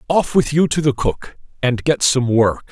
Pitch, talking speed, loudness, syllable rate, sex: 140 Hz, 220 wpm, -17 LUFS, 4.4 syllables/s, male